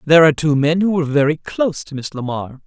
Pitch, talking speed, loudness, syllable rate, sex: 155 Hz, 245 wpm, -17 LUFS, 6.7 syllables/s, female